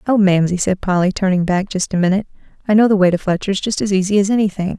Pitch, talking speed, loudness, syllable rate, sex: 195 Hz, 250 wpm, -16 LUFS, 6.8 syllables/s, female